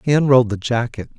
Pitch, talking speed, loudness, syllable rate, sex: 125 Hz, 205 wpm, -17 LUFS, 6.7 syllables/s, male